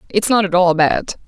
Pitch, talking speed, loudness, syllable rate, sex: 185 Hz, 235 wpm, -15 LUFS, 5.2 syllables/s, female